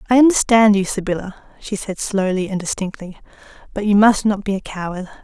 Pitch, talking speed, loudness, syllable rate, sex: 200 Hz, 185 wpm, -18 LUFS, 5.8 syllables/s, female